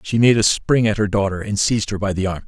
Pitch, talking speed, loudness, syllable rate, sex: 105 Hz, 315 wpm, -18 LUFS, 6.4 syllables/s, male